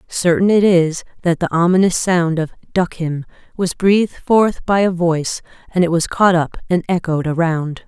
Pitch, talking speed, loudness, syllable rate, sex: 175 Hz, 185 wpm, -16 LUFS, 4.7 syllables/s, female